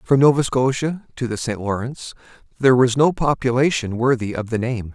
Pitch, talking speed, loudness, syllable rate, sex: 125 Hz, 180 wpm, -19 LUFS, 5.6 syllables/s, male